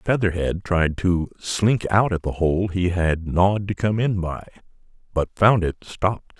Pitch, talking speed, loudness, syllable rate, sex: 95 Hz, 180 wpm, -22 LUFS, 4.3 syllables/s, male